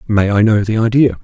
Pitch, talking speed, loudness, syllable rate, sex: 110 Hz, 245 wpm, -13 LUFS, 5.7 syllables/s, male